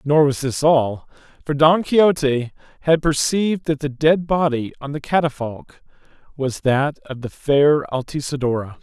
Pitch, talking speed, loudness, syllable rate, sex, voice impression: 145 Hz, 150 wpm, -19 LUFS, 4.6 syllables/s, male, masculine, adult-like, relaxed, soft, raspy, calm, friendly, wild, kind